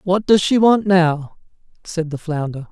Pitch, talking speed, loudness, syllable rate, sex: 175 Hz, 175 wpm, -17 LUFS, 4.2 syllables/s, male